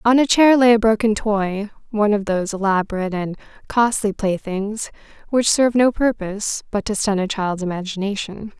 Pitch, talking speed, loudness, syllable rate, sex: 210 Hz, 170 wpm, -19 LUFS, 5.4 syllables/s, female